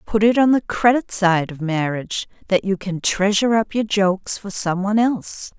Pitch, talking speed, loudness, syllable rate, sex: 200 Hz, 205 wpm, -19 LUFS, 5.2 syllables/s, female